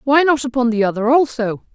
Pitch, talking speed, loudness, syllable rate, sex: 250 Hz, 205 wpm, -16 LUFS, 5.8 syllables/s, female